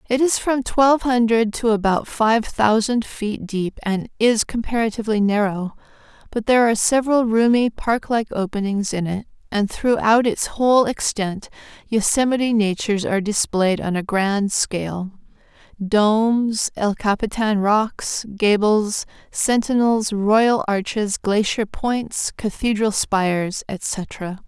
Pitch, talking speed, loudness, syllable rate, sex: 215 Hz, 125 wpm, -20 LUFS, 4.1 syllables/s, female